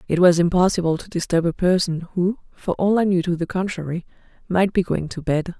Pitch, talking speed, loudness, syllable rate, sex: 175 Hz, 215 wpm, -21 LUFS, 5.5 syllables/s, female